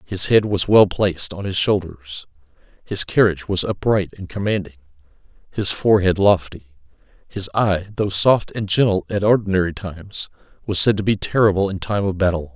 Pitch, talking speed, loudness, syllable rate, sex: 95 Hz, 165 wpm, -19 LUFS, 5.3 syllables/s, male